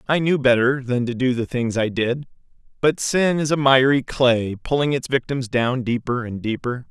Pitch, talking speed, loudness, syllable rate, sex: 125 Hz, 200 wpm, -20 LUFS, 4.8 syllables/s, male